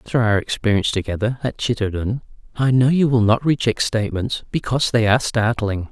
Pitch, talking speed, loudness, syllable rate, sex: 115 Hz, 175 wpm, -19 LUFS, 6.0 syllables/s, male